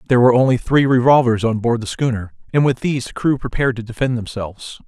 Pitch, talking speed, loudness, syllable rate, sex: 120 Hz, 220 wpm, -17 LUFS, 6.7 syllables/s, male